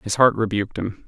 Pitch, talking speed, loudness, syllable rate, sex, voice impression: 105 Hz, 225 wpm, -21 LUFS, 5.8 syllables/s, male, masculine, adult-like, slightly thick, cool, sincere, slightly wild